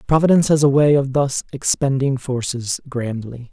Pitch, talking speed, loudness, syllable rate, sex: 135 Hz, 155 wpm, -18 LUFS, 5.0 syllables/s, male